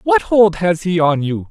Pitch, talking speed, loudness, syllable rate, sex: 180 Hz, 240 wpm, -15 LUFS, 4.3 syllables/s, male